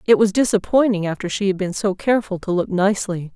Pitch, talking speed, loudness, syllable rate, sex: 200 Hz, 215 wpm, -19 LUFS, 6.2 syllables/s, female